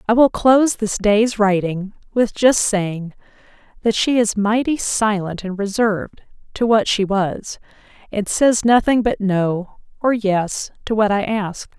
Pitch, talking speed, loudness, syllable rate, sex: 210 Hz, 160 wpm, -18 LUFS, 4.0 syllables/s, female